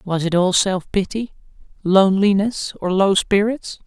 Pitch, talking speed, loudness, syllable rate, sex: 195 Hz, 140 wpm, -18 LUFS, 4.4 syllables/s, female